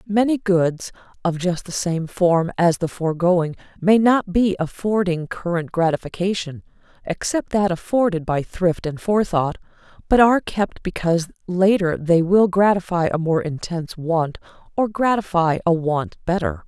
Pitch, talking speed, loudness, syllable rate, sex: 180 Hz, 145 wpm, -20 LUFS, 4.2 syllables/s, female